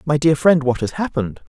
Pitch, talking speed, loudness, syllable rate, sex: 145 Hz, 235 wpm, -18 LUFS, 5.8 syllables/s, male